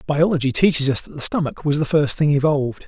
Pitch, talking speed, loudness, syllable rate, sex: 145 Hz, 230 wpm, -19 LUFS, 6.2 syllables/s, male